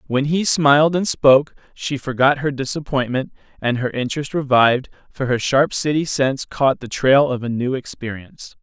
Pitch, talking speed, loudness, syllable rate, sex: 135 Hz, 175 wpm, -18 LUFS, 5.1 syllables/s, male